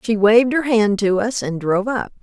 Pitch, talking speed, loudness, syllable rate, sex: 220 Hz, 245 wpm, -17 LUFS, 5.4 syllables/s, female